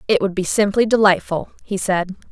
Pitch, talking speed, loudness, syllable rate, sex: 195 Hz, 180 wpm, -18 LUFS, 5.3 syllables/s, female